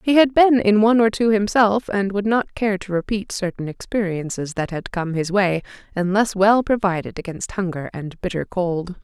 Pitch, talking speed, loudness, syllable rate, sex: 200 Hz, 195 wpm, -20 LUFS, 4.9 syllables/s, female